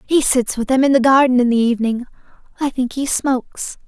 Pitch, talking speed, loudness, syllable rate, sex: 255 Hz, 215 wpm, -16 LUFS, 5.8 syllables/s, female